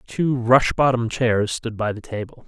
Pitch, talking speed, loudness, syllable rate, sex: 120 Hz, 195 wpm, -21 LUFS, 4.3 syllables/s, male